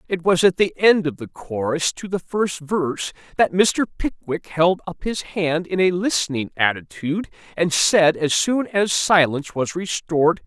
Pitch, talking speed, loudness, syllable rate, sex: 175 Hz, 180 wpm, -20 LUFS, 4.5 syllables/s, male